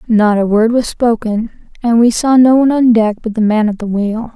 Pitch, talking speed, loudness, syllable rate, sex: 225 Hz, 250 wpm, -12 LUFS, 5.2 syllables/s, female